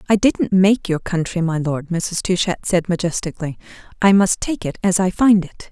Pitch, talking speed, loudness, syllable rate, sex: 185 Hz, 200 wpm, -18 LUFS, 5.1 syllables/s, female